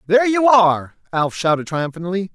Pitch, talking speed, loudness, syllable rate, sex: 185 Hz, 155 wpm, -17 LUFS, 5.5 syllables/s, male